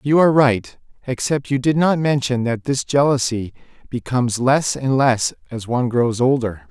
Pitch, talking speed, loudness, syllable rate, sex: 125 Hz, 170 wpm, -18 LUFS, 4.8 syllables/s, male